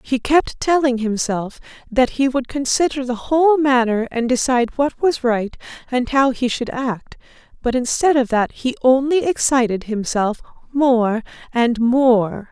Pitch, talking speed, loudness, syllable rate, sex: 250 Hz, 155 wpm, -18 LUFS, 4.3 syllables/s, female